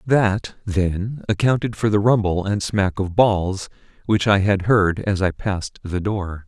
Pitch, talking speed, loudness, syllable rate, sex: 100 Hz, 175 wpm, -20 LUFS, 3.9 syllables/s, male